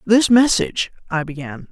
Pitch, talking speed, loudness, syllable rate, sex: 200 Hz, 140 wpm, -17 LUFS, 5.0 syllables/s, female